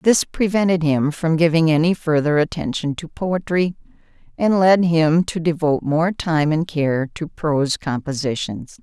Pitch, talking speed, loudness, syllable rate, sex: 160 Hz, 150 wpm, -19 LUFS, 4.4 syllables/s, female